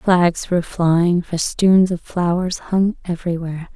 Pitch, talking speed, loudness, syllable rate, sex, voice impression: 175 Hz, 130 wpm, -18 LUFS, 4.1 syllables/s, female, feminine, slightly young, relaxed, weak, dark, soft, slightly cute, calm, reassuring, elegant, kind, modest